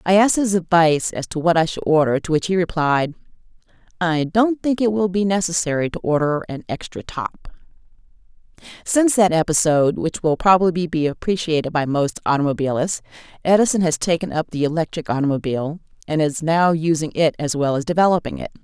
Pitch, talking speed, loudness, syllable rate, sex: 165 Hz, 175 wpm, -19 LUFS, 5.9 syllables/s, female